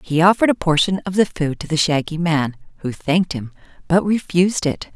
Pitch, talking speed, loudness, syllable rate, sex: 165 Hz, 205 wpm, -19 LUFS, 5.7 syllables/s, female